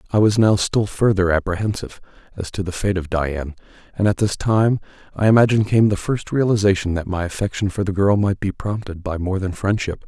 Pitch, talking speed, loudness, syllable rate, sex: 100 Hz, 210 wpm, -19 LUFS, 5.8 syllables/s, male